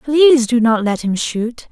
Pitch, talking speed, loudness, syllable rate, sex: 240 Hz, 210 wpm, -15 LUFS, 4.4 syllables/s, female